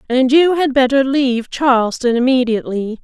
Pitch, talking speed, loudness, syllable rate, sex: 255 Hz, 140 wpm, -15 LUFS, 5.3 syllables/s, female